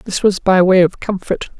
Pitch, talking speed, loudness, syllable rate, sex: 190 Hz, 225 wpm, -14 LUFS, 5.0 syllables/s, female